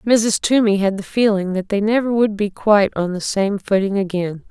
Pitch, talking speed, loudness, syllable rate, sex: 205 Hz, 215 wpm, -18 LUFS, 5.1 syllables/s, female